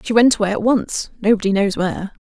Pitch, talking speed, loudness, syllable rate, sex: 215 Hz, 190 wpm, -18 LUFS, 6.1 syllables/s, female